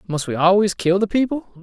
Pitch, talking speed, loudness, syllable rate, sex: 195 Hz, 220 wpm, -18 LUFS, 5.8 syllables/s, male